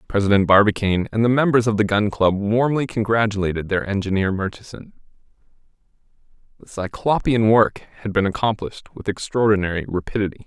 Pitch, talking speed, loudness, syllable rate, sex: 105 Hz, 130 wpm, -20 LUFS, 5.9 syllables/s, male